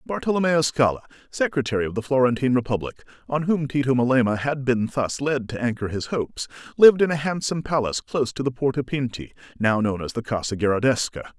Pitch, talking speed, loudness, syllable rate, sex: 130 Hz, 185 wpm, -22 LUFS, 6.5 syllables/s, male